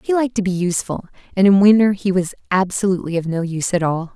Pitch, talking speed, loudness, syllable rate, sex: 190 Hz, 230 wpm, -18 LUFS, 6.9 syllables/s, female